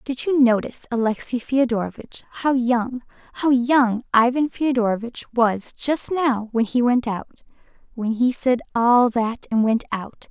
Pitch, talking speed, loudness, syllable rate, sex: 240 Hz, 150 wpm, -21 LUFS, 4.5 syllables/s, female